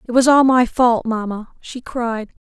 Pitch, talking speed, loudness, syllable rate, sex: 240 Hz, 195 wpm, -17 LUFS, 4.2 syllables/s, female